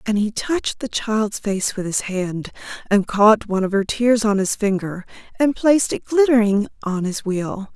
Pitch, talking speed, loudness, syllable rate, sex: 210 Hz, 195 wpm, -19 LUFS, 4.6 syllables/s, female